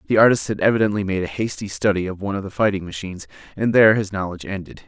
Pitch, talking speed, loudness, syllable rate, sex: 100 Hz, 235 wpm, -20 LUFS, 7.5 syllables/s, male